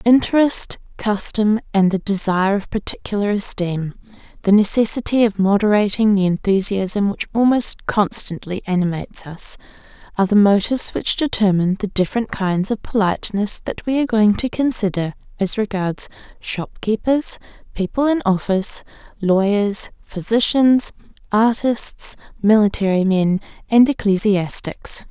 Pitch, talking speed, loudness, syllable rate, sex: 210 Hz, 110 wpm, -18 LUFS, 4.8 syllables/s, female